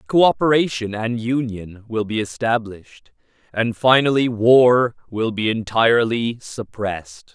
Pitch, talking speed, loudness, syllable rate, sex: 115 Hz, 105 wpm, -19 LUFS, 4.1 syllables/s, male